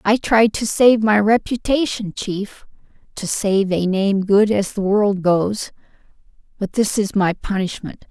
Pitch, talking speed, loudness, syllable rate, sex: 205 Hz, 150 wpm, -18 LUFS, 3.9 syllables/s, female